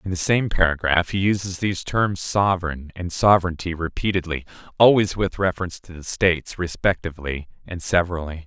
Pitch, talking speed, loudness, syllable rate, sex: 90 Hz, 140 wpm, -22 LUFS, 5.8 syllables/s, male